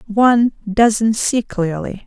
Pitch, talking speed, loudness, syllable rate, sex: 220 Hz, 115 wpm, -16 LUFS, 3.4 syllables/s, female